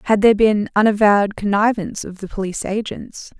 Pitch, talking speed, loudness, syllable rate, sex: 205 Hz, 160 wpm, -17 LUFS, 6.1 syllables/s, female